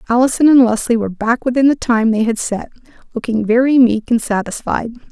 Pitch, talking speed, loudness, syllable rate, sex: 235 Hz, 190 wpm, -15 LUFS, 5.8 syllables/s, female